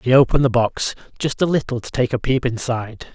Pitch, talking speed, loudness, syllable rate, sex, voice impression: 125 Hz, 230 wpm, -20 LUFS, 6.2 syllables/s, male, masculine, slightly middle-aged, slightly thick, slightly fluent, cool, slightly wild